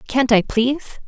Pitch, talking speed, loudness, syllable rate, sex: 250 Hz, 170 wpm, -18 LUFS, 5.9 syllables/s, female